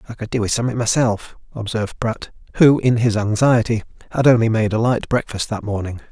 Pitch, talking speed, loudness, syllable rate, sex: 115 Hz, 195 wpm, -18 LUFS, 5.9 syllables/s, male